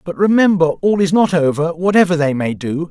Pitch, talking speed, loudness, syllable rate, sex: 170 Hz, 205 wpm, -15 LUFS, 5.6 syllables/s, male